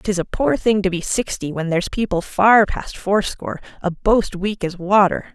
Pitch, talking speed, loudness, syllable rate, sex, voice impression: 195 Hz, 200 wpm, -19 LUFS, 4.7 syllables/s, female, very feminine, adult-like, slightly middle-aged, very thin, slightly relaxed, slightly weak, slightly dark, soft, clear, fluent, slightly raspy, slightly cute, cool, very intellectual, refreshing, very sincere, calm, friendly, reassuring, unique, elegant, slightly wild, sweet, slightly lively, slightly kind, slightly sharp, modest, light